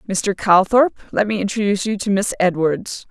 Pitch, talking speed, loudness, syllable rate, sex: 200 Hz, 175 wpm, -18 LUFS, 5.1 syllables/s, female